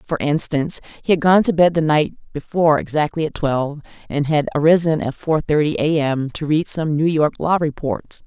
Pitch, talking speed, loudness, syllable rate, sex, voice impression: 155 Hz, 205 wpm, -18 LUFS, 5.3 syllables/s, female, feminine, very adult-like, slightly fluent, intellectual, slightly calm, elegant, slightly kind